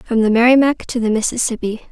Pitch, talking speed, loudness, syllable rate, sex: 235 Hz, 190 wpm, -15 LUFS, 6.1 syllables/s, female